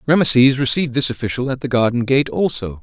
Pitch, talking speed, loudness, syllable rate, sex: 130 Hz, 190 wpm, -17 LUFS, 6.3 syllables/s, male